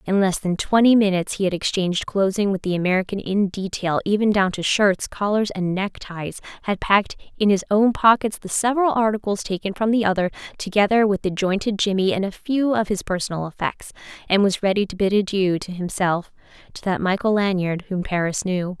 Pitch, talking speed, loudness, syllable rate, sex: 195 Hz, 195 wpm, -21 LUFS, 5.6 syllables/s, female